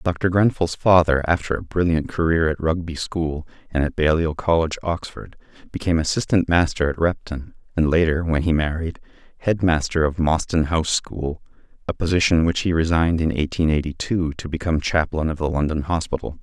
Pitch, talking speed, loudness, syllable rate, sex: 80 Hz, 170 wpm, -21 LUFS, 5.5 syllables/s, male